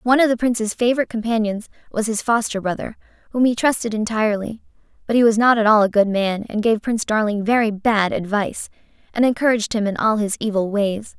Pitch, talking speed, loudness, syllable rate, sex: 220 Hz, 205 wpm, -19 LUFS, 6.2 syllables/s, female